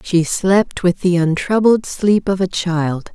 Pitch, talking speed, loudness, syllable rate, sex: 180 Hz, 170 wpm, -16 LUFS, 3.6 syllables/s, female